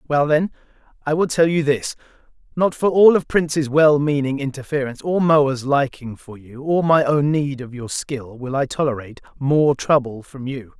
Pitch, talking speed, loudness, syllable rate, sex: 140 Hz, 190 wpm, -19 LUFS, 4.8 syllables/s, male